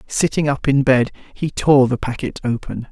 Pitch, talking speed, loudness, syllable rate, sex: 135 Hz, 185 wpm, -18 LUFS, 4.8 syllables/s, male